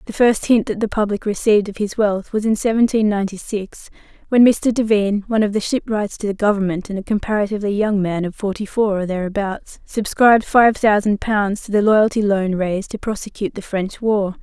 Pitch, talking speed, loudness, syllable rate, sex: 210 Hz, 205 wpm, -18 LUFS, 5.7 syllables/s, female